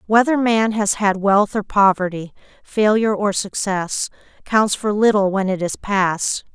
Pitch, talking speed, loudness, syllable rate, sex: 200 Hz, 155 wpm, -18 LUFS, 4.2 syllables/s, female